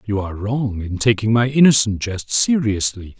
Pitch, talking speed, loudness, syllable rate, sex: 110 Hz, 170 wpm, -18 LUFS, 4.9 syllables/s, male